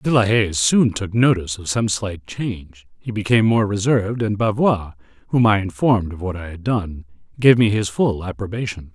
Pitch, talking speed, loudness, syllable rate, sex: 105 Hz, 195 wpm, -19 LUFS, 5.2 syllables/s, male